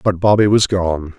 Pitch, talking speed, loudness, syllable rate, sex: 95 Hz, 205 wpm, -15 LUFS, 4.6 syllables/s, male